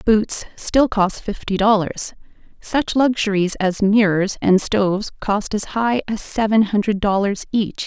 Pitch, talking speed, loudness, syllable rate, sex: 205 Hz, 145 wpm, -19 LUFS, 4.1 syllables/s, female